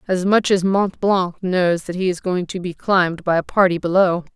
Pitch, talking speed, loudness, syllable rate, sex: 180 Hz, 235 wpm, -18 LUFS, 4.9 syllables/s, female